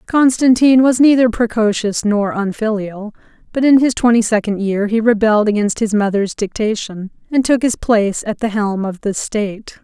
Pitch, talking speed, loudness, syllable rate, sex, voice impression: 220 Hz, 170 wpm, -15 LUFS, 5.1 syllables/s, female, feminine, adult-like, friendly, slightly reassuring